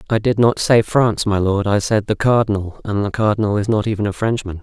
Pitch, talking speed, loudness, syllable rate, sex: 105 Hz, 245 wpm, -17 LUFS, 5.9 syllables/s, male